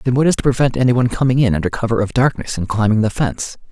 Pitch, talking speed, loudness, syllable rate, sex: 120 Hz, 275 wpm, -17 LUFS, 7.3 syllables/s, male